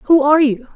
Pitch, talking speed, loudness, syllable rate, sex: 280 Hz, 235 wpm, -13 LUFS, 6.1 syllables/s, female